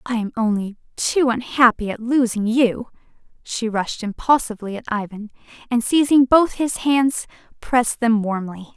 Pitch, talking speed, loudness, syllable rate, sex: 235 Hz, 145 wpm, -19 LUFS, 4.7 syllables/s, female